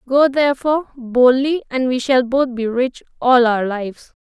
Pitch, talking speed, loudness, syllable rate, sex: 255 Hz, 170 wpm, -17 LUFS, 4.6 syllables/s, female